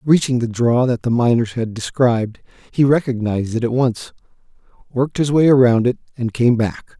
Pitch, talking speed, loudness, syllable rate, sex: 120 Hz, 180 wpm, -17 LUFS, 5.3 syllables/s, male